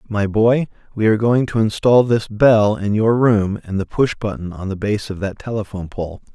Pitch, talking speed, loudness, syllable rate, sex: 105 Hz, 210 wpm, -18 LUFS, 5.0 syllables/s, male